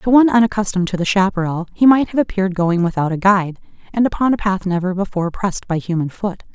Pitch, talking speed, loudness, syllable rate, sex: 195 Hz, 220 wpm, -17 LUFS, 6.8 syllables/s, female